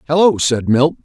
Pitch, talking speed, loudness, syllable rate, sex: 140 Hz, 175 wpm, -14 LUFS, 5.0 syllables/s, male